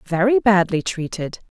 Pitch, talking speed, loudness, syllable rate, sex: 190 Hz, 115 wpm, -19 LUFS, 4.6 syllables/s, female